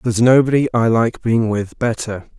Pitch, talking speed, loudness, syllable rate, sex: 115 Hz, 175 wpm, -16 LUFS, 5.1 syllables/s, male